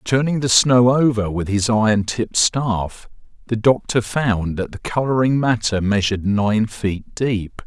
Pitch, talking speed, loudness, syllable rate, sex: 115 Hz, 155 wpm, -18 LUFS, 4.2 syllables/s, male